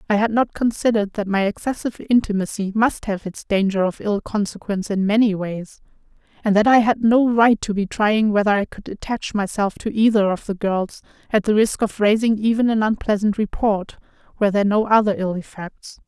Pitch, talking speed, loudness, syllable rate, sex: 210 Hz, 195 wpm, -19 LUFS, 5.5 syllables/s, female